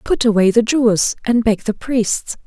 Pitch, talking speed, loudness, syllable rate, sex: 225 Hz, 195 wpm, -16 LUFS, 4.5 syllables/s, female